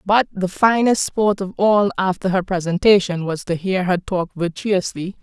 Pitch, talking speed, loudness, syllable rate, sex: 190 Hz, 170 wpm, -19 LUFS, 4.4 syllables/s, female